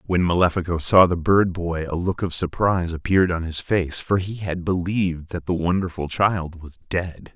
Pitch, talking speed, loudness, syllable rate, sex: 90 Hz, 195 wpm, -22 LUFS, 4.9 syllables/s, male